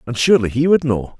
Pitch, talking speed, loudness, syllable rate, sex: 130 Hz, 250 wpm, -16 LUFS, 6.9 syllables/s, male